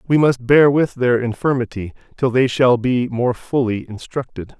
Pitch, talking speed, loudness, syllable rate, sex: 125 Hz, 170 wpm, -17 LUFS, 4.6 syllables/s, male